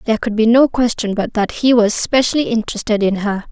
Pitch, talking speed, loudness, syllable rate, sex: 230 Hz, 220 wpm, -15 LUFS, 6.1 syllables/s, female